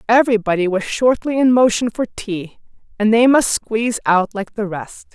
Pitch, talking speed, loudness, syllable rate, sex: 220 Hz, 175 wpm, -17 LUFS, 4.9 syllables/s, female